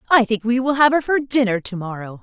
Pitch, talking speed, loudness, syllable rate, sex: 230 Hz, 270 wpm, -18 LUFS, 5.9 syllables/s, female